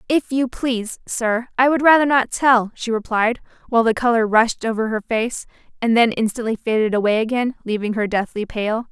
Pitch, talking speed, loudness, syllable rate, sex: 230 Hz, 190 wpm, -19 LUFS, 5.2 syllables/s, female